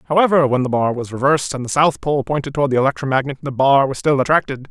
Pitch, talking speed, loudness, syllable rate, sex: 140 Hz, 240 wpm, -17 LUFS, 7.0 syllables/s, male